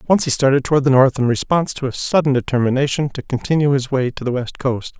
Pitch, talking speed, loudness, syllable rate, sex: 135 Hz, 240 wpm, -17 LUFS, 6.4 syllables/s, male